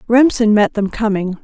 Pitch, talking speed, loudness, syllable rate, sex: 215 Hz, 165 wpm, -15 LUFS, 4.7 syllables/s, female